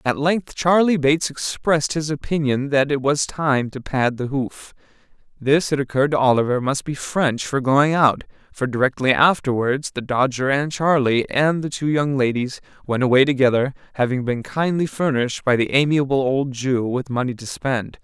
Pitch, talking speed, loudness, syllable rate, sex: 135 Hz, 180 wpm, -20 LUFS, 4.9 syllables/s, male